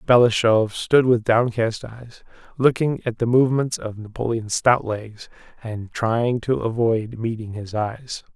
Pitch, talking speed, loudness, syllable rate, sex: 115 Hz, 145 wpm, -21 LUFS, 4.0 syllables/s, male